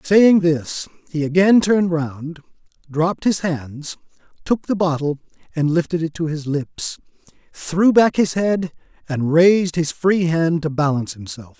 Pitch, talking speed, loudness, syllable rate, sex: 165 Hz, 155 wpm, -18 LUFS, 4.3 syllables/s, male